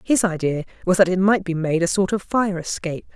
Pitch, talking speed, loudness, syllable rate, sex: 180 Hz, 250 wpm, -21 LUFS, 5.8 syllables/s, female